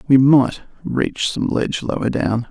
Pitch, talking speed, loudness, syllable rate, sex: 130 Hz, 165 wpm, -18 LUFS, 4.2 syllables/s, male